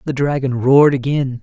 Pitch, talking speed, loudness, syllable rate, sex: 135 Hz, 170 wpm, -15 LUFS, 5.4 syllables/s, male